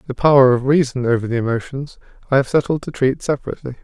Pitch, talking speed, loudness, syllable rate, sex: 130 Hz, 205 wpm, -17 LUFS, 7.0 syllables/s, male